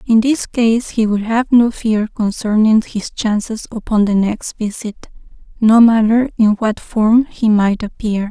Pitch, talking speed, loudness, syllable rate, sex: 220 Hz, 165 wpm, -15 LUFS, 4.0 syllables/s, female